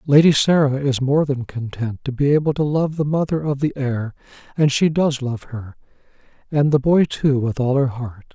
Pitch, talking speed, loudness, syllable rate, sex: 140 Hz, 210 wpm, -19 LUFS, 4.9 syllables/s, male